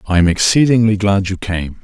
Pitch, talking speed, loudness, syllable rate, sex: 100 Hz, 195 wpm, -14 LUFS, 5.4 syllables/s, male